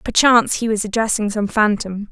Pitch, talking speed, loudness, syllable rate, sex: 215 Hz, 170 wpm, -17 LUFS, 5.5 syllables/s, female